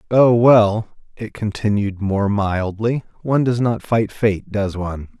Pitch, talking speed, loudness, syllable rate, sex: 105 Hz, 150 wpm, -18 LUFS, 4.0 syllables/s, male